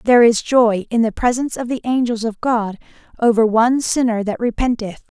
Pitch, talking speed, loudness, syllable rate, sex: 230 Hz, 185 wpm, -17 LUFS, 5.7 syllables/s, female